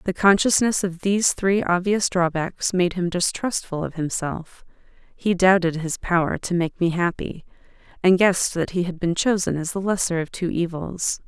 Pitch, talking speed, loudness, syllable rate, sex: 180 Hz, 175 wpm, -22 LUFS, 4.8 syllables/s, female